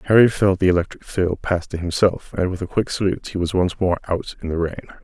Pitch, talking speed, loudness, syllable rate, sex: 90 Hz, 250 wpm, -21 LUFS, 6.2 syllables/s, male